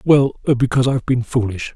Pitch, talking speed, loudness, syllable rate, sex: 125 Hz, 170 wpm, -18 LUFS, 6.0 syllables/s, male